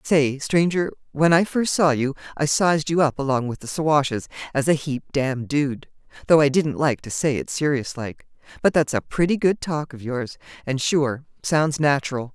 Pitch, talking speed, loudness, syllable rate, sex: 145 Hz, 200 wpm, -22 LUFS, 4.8 syllables/s, female